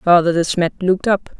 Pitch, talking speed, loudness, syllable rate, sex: 180 Hz, 215 wpm, -17 LUFS, 5.6 syllables/s, female